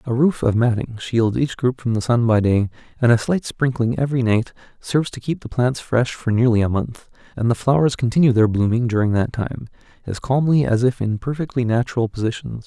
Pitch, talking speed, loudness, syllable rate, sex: 120 Hz, 215 wpm, -19 LUFS, 5.6 syllables/s, male